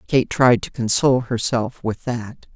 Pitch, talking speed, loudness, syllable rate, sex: 120 Hz, 165 wpm, -20 LUFS, 4.2 syllables/s, female